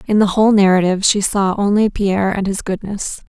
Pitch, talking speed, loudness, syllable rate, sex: 200 Hz, 200 wpm, -15 LUFS, 5.9 syllables/s, female